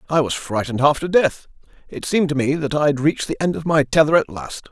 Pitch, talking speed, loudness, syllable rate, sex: 145 Hz, 255 wpm, -19 LUFS, 6.1 syllables/s, male